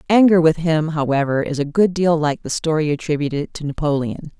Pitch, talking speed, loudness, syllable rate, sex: 155 Hz, 190 wpm, -18 LUFS, 5.5 syllables/s, female